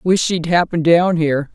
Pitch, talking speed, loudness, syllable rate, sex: 165 Hz, 195 wpm, -16 LUFS, 4.7 syllables/s, female